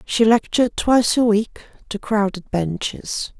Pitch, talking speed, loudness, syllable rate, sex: 215 Hz, 140 wpm, -19 LUFS, 4.3 syllables/s, female